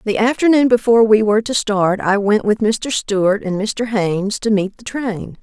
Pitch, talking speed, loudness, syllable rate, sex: 215 Hz, 210 wpm, -16 LUFS, 4.9 syllables/s, female